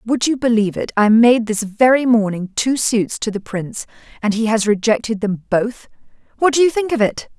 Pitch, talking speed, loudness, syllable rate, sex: 225 Hz, 210 wpm, -17 LUFS, 5.3 syllables/s, female